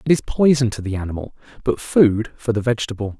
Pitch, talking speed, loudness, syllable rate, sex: 115 Hz, 205 wpm, -19 LUFS, 6.2 syllables/s, male